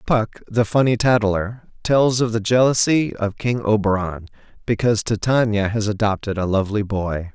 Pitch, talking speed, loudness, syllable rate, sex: 110 Hz, 145 wpm, -19 LUFS, 4.8 syllables/s, male